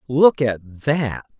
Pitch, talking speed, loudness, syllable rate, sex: 130 Hz, 130 wpm, -19 LUFS, 2.5 syllables/s, male